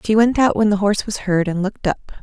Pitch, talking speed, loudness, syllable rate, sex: 205 Hz, 295 wpm, -18 LUFS, 6.3 syllables/s, female